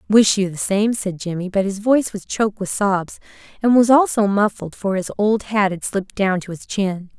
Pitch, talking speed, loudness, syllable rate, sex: 200 Hz, 225 wpm, -19 LUFS, 5.1 syllables/s, female